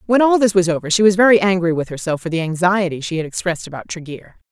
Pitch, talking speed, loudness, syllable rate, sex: 180 Hz, 250 wpm, -16 LUFS, 6.8 syllables/s, female